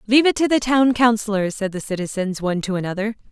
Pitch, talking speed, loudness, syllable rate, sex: 215 Hz, 215 wpm, -20 LUFS, 6.6 syllables/s, female